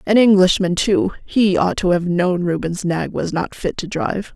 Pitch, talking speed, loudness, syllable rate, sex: 185 Hz, 195 wpm, -18 LUFS, 4.7 syllables/s, female